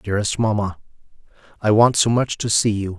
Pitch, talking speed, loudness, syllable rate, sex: 105 Hz, 160 wpm, -19 LUFS, 5.7 syllables/s, male